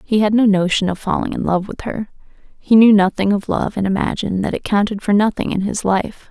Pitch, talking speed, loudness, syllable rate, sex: 200 Hz, 240 wpm, -17 LUFS, 5.7 syllables/s, female